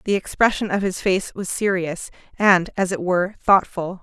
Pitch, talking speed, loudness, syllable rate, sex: 190 Hz, 180 wpm, -20 LUFS, 4.8 syllables/s, female